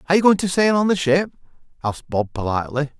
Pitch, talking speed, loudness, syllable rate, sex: 160 Hz, 220 wpm, -20 LUFS, 7.1 syllables/s, male